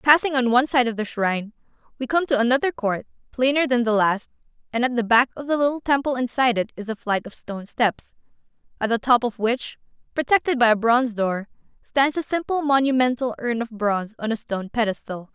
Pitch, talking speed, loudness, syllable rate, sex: 240 Hz, 205 wpm, -22 LUFS, 5.9 syllables/s, female